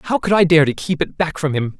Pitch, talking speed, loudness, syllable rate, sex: 160 Hz, 335 wpm, -17 LUFS, 5.7 syllables/s, male